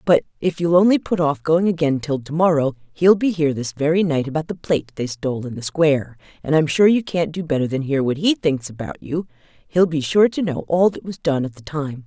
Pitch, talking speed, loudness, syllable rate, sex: 155 Hz, 255 wpm, -19 LUFS, 5.6 syllables/s, female